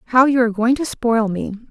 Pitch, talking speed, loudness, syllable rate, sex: 235 Hz, 245 wpm, -18 LUFS, 6.2 syllables/s, female